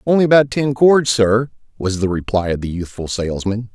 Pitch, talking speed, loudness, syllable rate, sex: 115 Hz, 190 wpm, -17 LUFS, 5.4 syllables/s, male